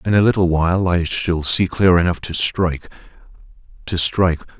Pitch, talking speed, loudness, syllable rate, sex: 90 Hz, 155 wpm, -17 LUFS, 5.4 syllables/s, male